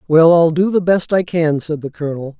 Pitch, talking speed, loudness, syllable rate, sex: 165 Hz, 250 wpm, -15 LUFS, 5.4 syllables/s, male